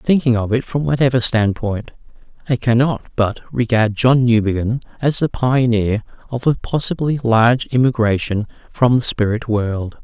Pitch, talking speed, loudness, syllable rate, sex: 120 Hz, 145 wpm, -17 LUFS, 4.6 syllables/s, male